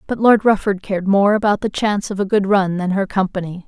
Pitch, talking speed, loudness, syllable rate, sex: 200 Hz, 245 wpm, -17 LUFS, 6.0 syllables/s, female